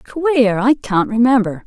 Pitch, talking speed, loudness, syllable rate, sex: 240 Hz, 145 wpm, -15 LUFS, 4.2 syllables/s, female